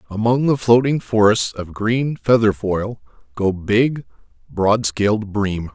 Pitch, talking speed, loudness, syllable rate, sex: 110 Hz, 135 wpm, -18 LUFS, 3.8 syllables/s, male